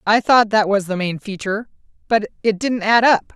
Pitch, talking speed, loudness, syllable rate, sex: 210 Hz, 215 wpm, -17 LUFS, 5.2 syllables/s, female